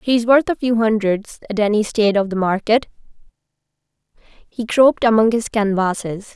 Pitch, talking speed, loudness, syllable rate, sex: 220 Hz, 150 wpm, -17 LUFS, 5.1 syllables/s, female